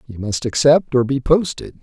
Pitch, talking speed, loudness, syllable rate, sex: 140 Hz, 195 wpm, -17 LUFS, 4.7 syllables/s, male